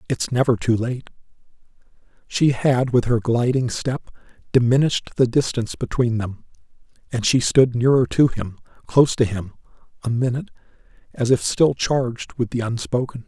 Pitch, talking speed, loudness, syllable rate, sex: 125 Hz, 150 wpm, -20 LUFS, 5.1 syllables/s, male